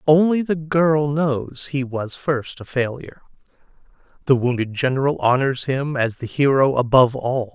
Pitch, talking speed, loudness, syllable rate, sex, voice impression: 135 Hz, 150 wpm, -20 LUFS, 4.5 syllables/s, male, masculine, adult-like, tensed, slightly powerful, bright, clear, intellectual, friendly, reassuring, lively, kind